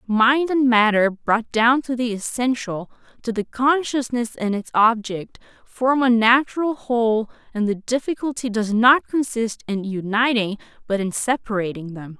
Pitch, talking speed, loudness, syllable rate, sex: 230 Hz, 150 wpm, -20 LUFS, 4.4 syllables/s, female